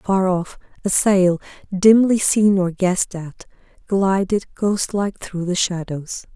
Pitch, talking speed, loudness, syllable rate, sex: 190 Hz, 140 wpm, -19 LUFS, 3.8 syllables/s, female